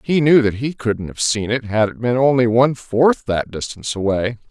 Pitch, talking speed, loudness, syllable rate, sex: 120 Hz, 225 wpm, -18 LUFS, 5.1 syllables/s, male